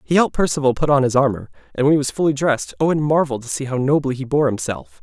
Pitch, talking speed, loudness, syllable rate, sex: 140 Hz, 265 wpm, -19 LUFS, 7.1 syllables/s, male